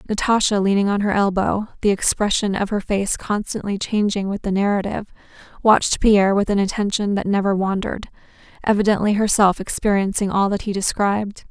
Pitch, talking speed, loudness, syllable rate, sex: 200 Hz, 150 wpm, -19 LUFS, 5.7 syllables/s, female